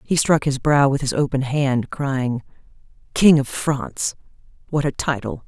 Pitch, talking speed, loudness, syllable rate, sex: 135 Hz, 155 wpm, -20 LUFS, 4.4 syllables/s, female